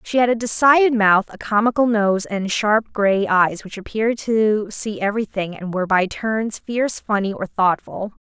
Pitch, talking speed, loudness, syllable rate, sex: 210 Hz, 180 wpm, -19 LUFS, 4.7 syllables/s, female